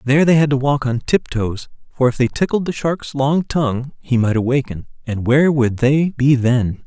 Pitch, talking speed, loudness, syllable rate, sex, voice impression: 135 Hz, 200 wpm, -17 LUFS, 5.0 syllables/s, male, masculine, adult-like, slightly clear, cool, slightly refreshing, sincere